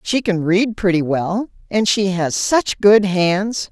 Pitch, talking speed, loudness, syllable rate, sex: 195 Hz, 180 wpm, -17 LUFS, 3.5 syllables/s, female